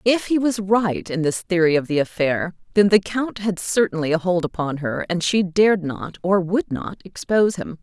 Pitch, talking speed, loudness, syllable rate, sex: 185 Hz, 215 wpm, -20 LUFS, 4.9 syllables/s, female